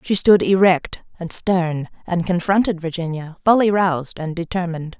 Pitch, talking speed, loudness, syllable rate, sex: 175 Hz, 145 wpm, -19 LUFS, 4.9 syllables/s, female